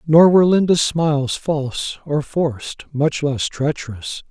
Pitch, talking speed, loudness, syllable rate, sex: 150 Hz, 140 wpm, -18 LUFS, 4.3 syllables/s, male